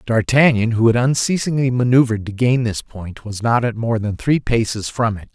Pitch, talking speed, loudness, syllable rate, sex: 115 Hz, 200 wpm, -17 LUFS, 5.2 syllables/s, male